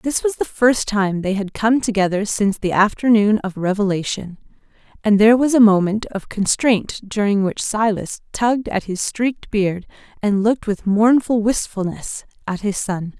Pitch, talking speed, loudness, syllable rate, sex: 210 Hz, 170 wpm, -18 LUFS, 4.7 syllables/s, female